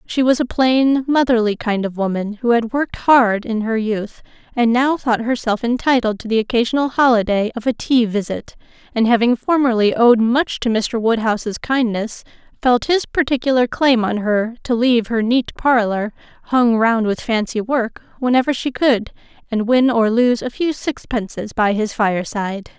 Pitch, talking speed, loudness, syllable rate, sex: 235 Hz, 175 wpm, -17 LUFS, 4.8 syllables/s, female